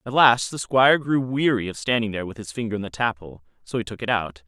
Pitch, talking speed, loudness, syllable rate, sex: 110 Hz, 270 wpm, -22 LUFS, 6.5 syllables/s, male